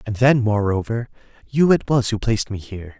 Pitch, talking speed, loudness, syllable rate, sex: 110 Hz, 200 wpm, -20 LUFS, 5.6 syllables/s, male